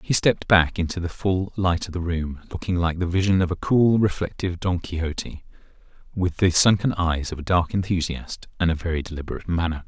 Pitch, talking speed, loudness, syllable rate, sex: 90 Hz, 200 wpm, -23 LUFS, 5.8 syllables/s, male